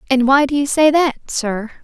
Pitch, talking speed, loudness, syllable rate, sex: 270 Hz, 230 wpm, -15 LUFS, 4.5 syllables/s, female